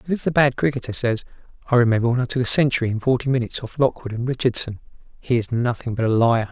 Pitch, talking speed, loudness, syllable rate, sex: 125 Hz, 240 wpm, -20 LUFS, 7.1 syllables/s, male